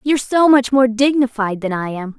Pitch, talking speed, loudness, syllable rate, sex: 245 Hz, 220 wpm, -16 LUFS, 5.3 syllables/s, female